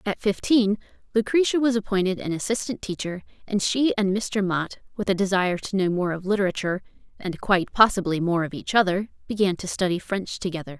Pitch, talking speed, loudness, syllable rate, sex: 195 Hz, 185 wpm, -24 LUFS, 5.9 syllables/s, female